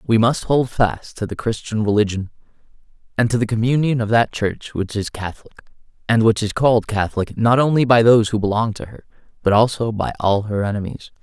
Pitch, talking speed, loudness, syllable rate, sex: 110 Hz, 200 wpm, -18 LUFS, 5.7 syllables/s, male